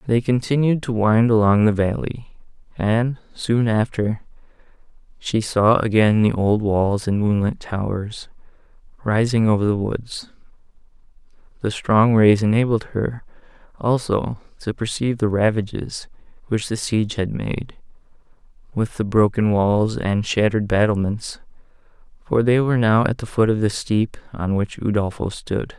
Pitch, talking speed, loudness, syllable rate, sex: 110 Hz, 135 wpm, -20 LUFS, 4.5 syllables/s, male